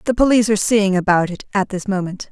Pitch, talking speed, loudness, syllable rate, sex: 200 Hz, 235 wpm, -17 LUFS, 6.7 syllables/s, female